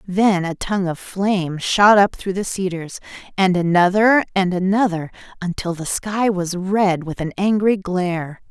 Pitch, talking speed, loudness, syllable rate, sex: 190 Hz, 160 wpm, -19 LUFS, 4.4 syllables/s, female